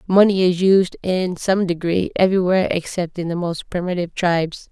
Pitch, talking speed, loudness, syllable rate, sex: 180 Hz, 165 wpm, -19 LUFS, 5.4 syllables/s, female